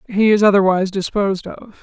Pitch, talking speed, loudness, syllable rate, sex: 200 Hz, 165 wpm, -16 LUFS, 6.1 syllables/s, female